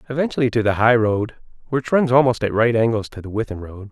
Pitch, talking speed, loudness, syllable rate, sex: 115 Hz, 230 wpm, -19 LUFS, 6.3 syllables/s, male